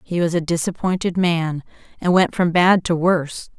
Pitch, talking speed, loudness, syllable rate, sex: 170 Hz, 185 wpm, -19 LUFS, 4.9 syllables/s, female